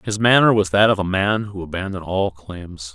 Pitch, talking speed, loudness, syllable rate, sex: 95 Hz, 225 wpm, -18 LUFS, 5.3 syllables/s, male